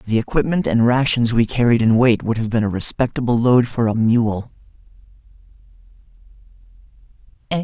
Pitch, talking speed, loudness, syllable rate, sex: 120 Hz, 135 wpm, -17 LUFS, 5.4 syllables/s, male